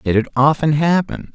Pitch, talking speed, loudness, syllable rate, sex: 150 Hz, 180 wpm, -16 LUFS, 4.9 syllables/s, male